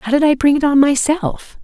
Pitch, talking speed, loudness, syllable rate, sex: 285 Hz, 255 wpm, -14 LUFS, 5.1 syllables/s, female